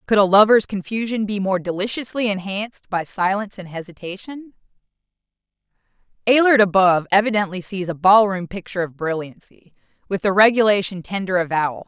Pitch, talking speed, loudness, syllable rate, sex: 195 Hz, 130 wpm, -19 LUFS, 5.8 syllables/s, female